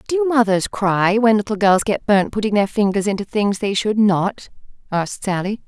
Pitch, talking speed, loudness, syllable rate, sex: 205 Hz, 190 wpm, -18 LUFS, 4.9 syllables/s, female